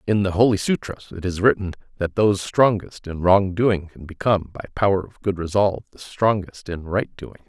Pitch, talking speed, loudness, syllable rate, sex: 95 Hz, 200 wpm, -21 LUFS, 5.4 syllables/s, male